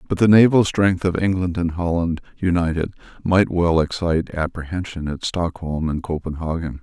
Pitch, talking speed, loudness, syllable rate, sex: 85 Hz, 150 wpm, -20 LUFS, 5.0 syllables/s, male